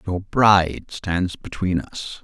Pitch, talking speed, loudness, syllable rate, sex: 90 Hz, 135 wpm, -21 LUFS, 3.6 syllables/s, male